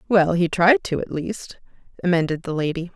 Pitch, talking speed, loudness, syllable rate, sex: 175 Hz, 185 wpm, -21 LUFS, 5.1 syllables/s, female